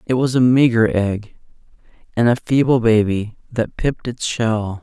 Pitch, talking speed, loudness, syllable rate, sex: 115 Hz, 160 wpm, -17 LUFS, 4.4 syllables/s, male